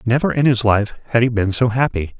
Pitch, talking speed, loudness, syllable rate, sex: 115 Hz, 245 wpm, -17 LUFS, 5.7 syllables/s, male